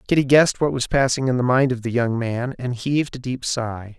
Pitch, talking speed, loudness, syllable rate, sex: 125 Hz, 255 wpm, -20 LUFS, 5.5 syllables/s, male